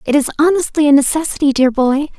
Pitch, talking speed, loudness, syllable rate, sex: 290 Hz, 190 wpm, -14 LUFS, 6.3 syllables/s, female